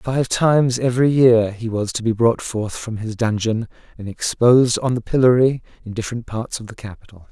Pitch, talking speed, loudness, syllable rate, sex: 115 Hz, 195 wpm, -18 LUFS, 5.3 syllables/s, male